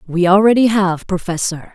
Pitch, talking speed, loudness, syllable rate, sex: 190 Hz, 140 wpm, -15 LUFS, 5.0 syllables/s, female